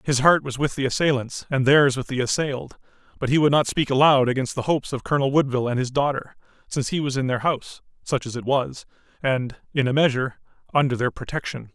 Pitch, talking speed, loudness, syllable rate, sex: 135 Hz, 220 wpm, -22 LUFS, 6.4 syllables/s, male